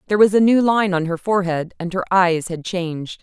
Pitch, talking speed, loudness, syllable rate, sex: 185 Hz, 240 wpm, -18 LUFS, 5.8 syllables/s, female